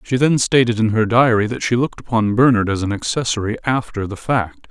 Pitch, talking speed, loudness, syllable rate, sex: 115 Hz, 215 wpm, -17 LUFS, 5.7 syllables/s, male